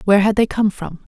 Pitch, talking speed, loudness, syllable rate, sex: 205 Hz, 260 wpm, -17 LUFS, 6.4 syllables/s, female